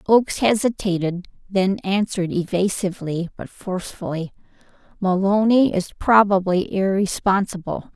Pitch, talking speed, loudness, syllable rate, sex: 190 Hz, 85 wpm, -21 LUFS, 4.8 syllables/s, female